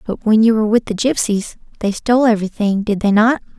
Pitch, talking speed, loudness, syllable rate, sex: 220 Hz, 235 wpm, -16 LUFS, 6.1 syllables/s, female